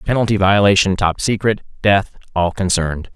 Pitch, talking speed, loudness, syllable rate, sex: 95 Hz, 115 wpm, -16 LUFS, 5.3 syllables/s, male